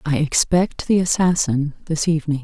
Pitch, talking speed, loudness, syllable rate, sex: 160 Hz, 150 wpm, -19 LUFS, 5.0 syllables/s, female